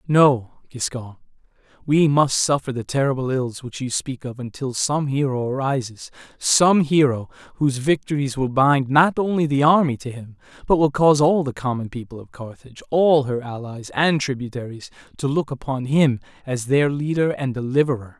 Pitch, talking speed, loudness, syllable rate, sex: 135 Hz, 160 wpm, -20 LUFS, 5.0 syllables/s, male